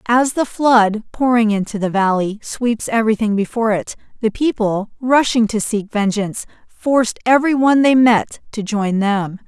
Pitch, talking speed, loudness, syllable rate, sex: 225 Hz, 160 wpm, -16 LUFS, 4.8 syllables/s, female